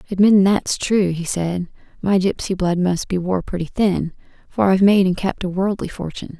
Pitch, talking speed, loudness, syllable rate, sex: 185 Hz, 195 wpm, -19 LUFS, 5.2 syllables/s, female